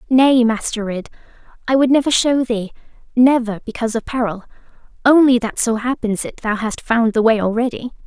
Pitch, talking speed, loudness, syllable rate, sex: 235 Hz, 155 wpm, -17 LUFS, 5.5 syllables/s, female